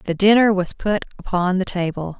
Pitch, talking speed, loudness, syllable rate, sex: 190 Hz, 190 wpm, -19 LUFS, 5.3 syllables/s, female